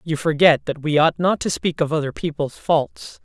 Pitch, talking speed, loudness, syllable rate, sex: 160 Hz, 220 wpm, -20 LUFS, 4.8 syllables/s, female